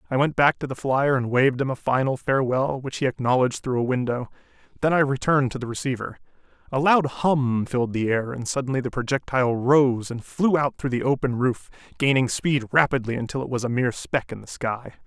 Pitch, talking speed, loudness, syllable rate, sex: 130 Hz, 215 wpm, -23 LUFS, 5.8 syllables/s, male